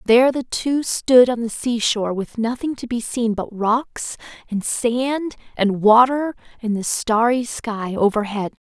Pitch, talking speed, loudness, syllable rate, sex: 235 Hz, 165 wpm, -20 LUFS, 4.0 syllables/s, female